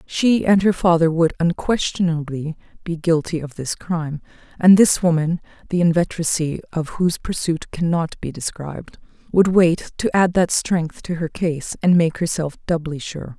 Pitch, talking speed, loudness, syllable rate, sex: 165 Hz, 160 wpm, -19 LUFS, 3.7 syllables/s, female